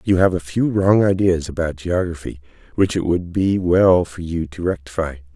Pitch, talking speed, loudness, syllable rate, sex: 85 Hz, 190 wpm, -19 LUFS, 4.8 syllables/s, male